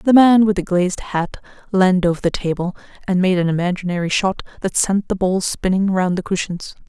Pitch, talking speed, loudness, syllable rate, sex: 185 Hz, 200 wpm, -18 LUFS, 5.6 syllables/s, female